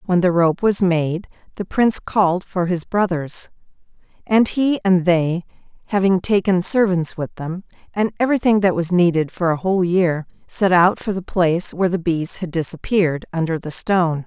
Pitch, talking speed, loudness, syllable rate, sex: 180 Hz, 175 wpm, -19 LUFS, 5.0 syllables/s, female